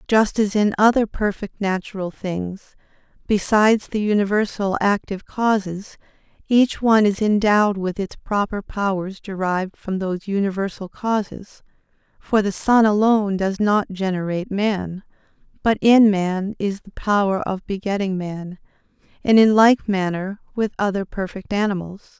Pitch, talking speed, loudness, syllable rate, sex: 200 Hz, 135 wpm, -20 LUFS, 4.7 syllables/s, female